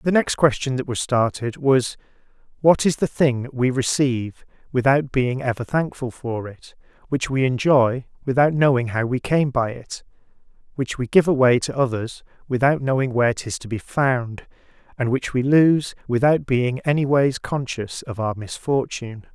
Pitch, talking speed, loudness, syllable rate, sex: 130 Hz, 165 wpm, -21 LUFS, 4.7 syllables/s, male